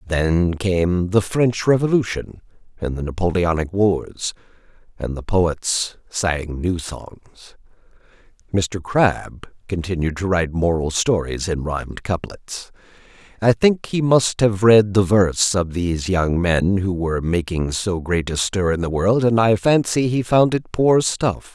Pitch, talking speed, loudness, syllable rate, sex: 95 Hz, 155 wpm, -19 LUFS, 4.1 syllables/s, male